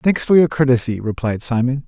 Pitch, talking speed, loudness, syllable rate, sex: 130 Hz, 195 wpm, -17 LUFS, 5.5 syllables/s, male